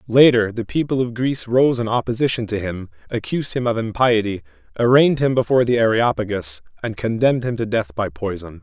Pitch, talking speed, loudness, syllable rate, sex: 115 Hz, 180 wpm, -19 LUFS, 6.0 syllables/s, male